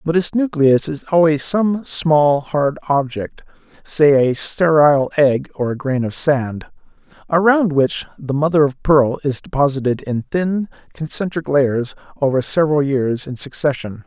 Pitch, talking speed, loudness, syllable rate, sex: 145 Hz, 150 wpm, -17 LUFS, 4.3 syllables/s, male